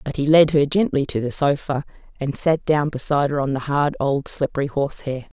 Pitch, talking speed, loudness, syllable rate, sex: 145 Hz, 210 wpm, -20 LUFS, 5.6 syllables/s, female